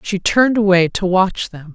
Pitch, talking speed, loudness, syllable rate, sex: 190 Hz, 205 wpm, -15 LUFS, 4.9 syllables/s, female